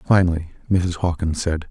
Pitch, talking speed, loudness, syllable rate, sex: 85 Hz, 140 wpm, -21 LUFS, 5.2 syllables/s, male